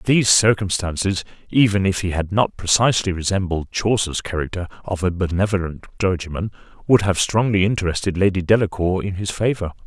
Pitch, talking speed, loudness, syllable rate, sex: 95 Hz, 145 wpm, -20 LUFS, 5.6 syllables/s, male